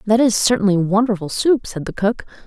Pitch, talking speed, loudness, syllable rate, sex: 210 Hz, 195 wpm, -17 LUFS, 5.6 syllables/s, female